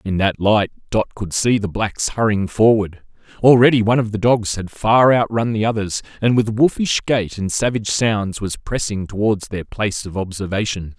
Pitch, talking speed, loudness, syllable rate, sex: 105 Hz, 185 wpm, -18 LUFS, 5.0 syllables/s, male